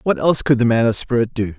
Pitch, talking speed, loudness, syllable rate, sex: 120 Hz, 300 wpm, -17 LUFS, 6.8 syllables/s, male